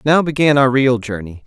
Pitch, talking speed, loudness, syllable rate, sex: 130 Hz, 205 wpm, -14 LUFS, 5.2 syllables/s, male